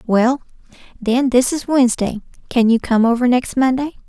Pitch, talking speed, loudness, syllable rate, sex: 245 Hz, 160 wpm, -17 LUFS, 5.1 syllables/s, female